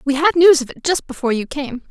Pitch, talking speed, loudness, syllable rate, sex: 285 Hz, 285 wpm, -16 LUFS, 6.2 syllables/s, female